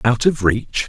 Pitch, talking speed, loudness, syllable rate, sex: 120 Hz, 205 wpm, -18 LUFS, 3.9 syllables/s, male